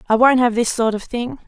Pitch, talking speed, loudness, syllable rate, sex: 235 Hz, 285 wpm, -17 LUFS, 5.7 syllables/s, female